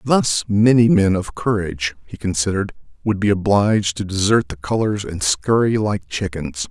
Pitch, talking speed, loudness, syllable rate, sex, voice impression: 100 Hz, 160 wpm, -19 LUFS, 4.9 syllables/s, male, masculine, middle-aged, thick, tensed, powerful, slightly hard, slightly muffled, slightly intellectual, calm, mature, reassuring, wild, kind